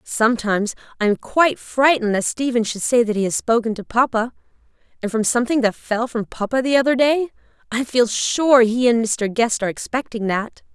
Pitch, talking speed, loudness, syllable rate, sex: 235 Hz, 195 wpm, -19 LUFS, 5.5 syllables/s, female